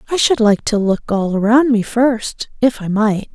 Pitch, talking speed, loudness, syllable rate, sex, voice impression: 225 Hz, 215 wpm, -15 LUFS, 4.0 syllables/s, female, very feminine, very adult-like, slightly middle-aged, very thin, slightly relaxed, slightly weak, bright, very soft, very clear, fluent, slightly raspy, very cute, intellectual, refreshing, very sincere, very calm, very friendly, reassuring, very unique, very elegant, slightly wild, sweet, very kind, very modest